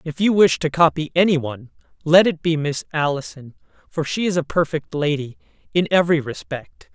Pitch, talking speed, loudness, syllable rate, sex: 160 Hz, 180 wpm, -19 LUFS, 5.4 syllables/s, female